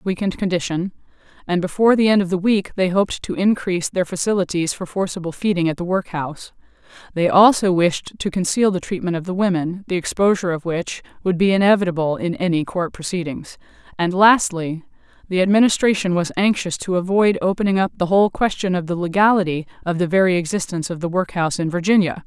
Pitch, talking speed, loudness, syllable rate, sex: 185 Hz, 180 wpm, -19 LUFS, 6.1 syllables/s, female